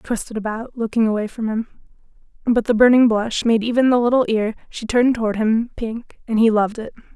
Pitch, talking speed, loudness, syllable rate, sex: 225 Hz, 210 wpm, -19 LUFS, 5.9 syllables/s, female